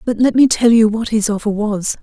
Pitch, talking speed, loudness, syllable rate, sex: 220 Hz, 265 wpm, -14 LUFS, 5.3 syllables/s, female